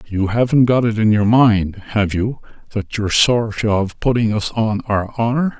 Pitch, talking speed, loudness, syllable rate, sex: 110 Hz, 195 wpm, -17 LUFS, 4.5 syllables/s, male